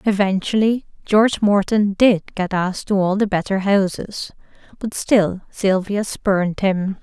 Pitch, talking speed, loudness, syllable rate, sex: 200 Hz, 135 wpm, -19 LUFS, 4.2 syllables/s, female